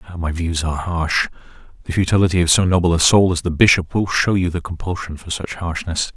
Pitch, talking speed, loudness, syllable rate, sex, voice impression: 85 Hz, 215 wpm, -18 LUFS, 6.0 syllables/s, male, very masculine, very adult-like, slightly old, very thick, slightly relaxed, slightly weak, dark, soft, very muffled, fluent, very cool, very intellectual, sincere, very calm, very mature, very friendly, very reassuring, very unique, elegant, very wild, sweet, kind, modest